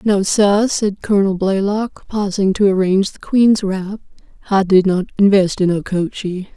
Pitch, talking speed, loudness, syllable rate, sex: 195 Hz, 155 wpm, -16 LUFS, 4.6 syllables/s, female